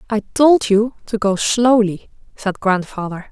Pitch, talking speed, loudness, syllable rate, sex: 210 Hz, 145 wpm, -17 LUFS, 4.0 syllables/s, female